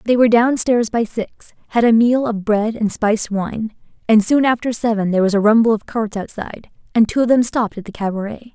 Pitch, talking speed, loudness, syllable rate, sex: 220 Hz, 225 wpm, -17 LUFS, 5.7 syllables/s, female